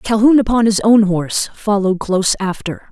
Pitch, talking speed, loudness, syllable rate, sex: 205 Hz, 165 wpm, -15 LUFS, 5.3 syllables/s, female